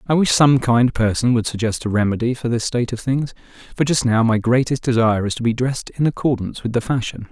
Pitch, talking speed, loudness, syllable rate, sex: 120 Hz, 240 wpm, -19 LUFS, 6.3 syllables/s, male